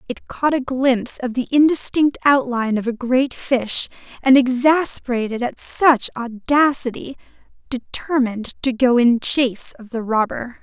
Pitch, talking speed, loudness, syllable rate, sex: 250 Hz, 140 wpm, -18 LUFS, 4.5 syllables/s, female